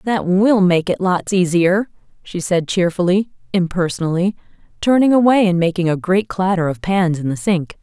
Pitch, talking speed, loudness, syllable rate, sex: 185 Hz, 170 wpm, -17 LUFS, 4.9 syllables/s, female